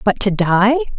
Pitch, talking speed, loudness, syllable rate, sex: 225 Hz, 180 wpm, -15 LUFS, 4.5 syllables/s, female